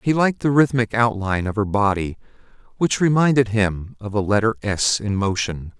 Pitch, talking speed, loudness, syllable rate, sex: 110 Hz, 175 wpm, -20 LUFS, 5.3 syllables/s, male